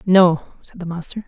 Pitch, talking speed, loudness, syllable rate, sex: 180 Hz, 190 wpm, -19 LUFS, 6.5 syllables/s, female